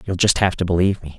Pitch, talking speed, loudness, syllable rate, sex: 90 Hz, 305 wpm, -19 LUFS, 7.6 syllables/s, male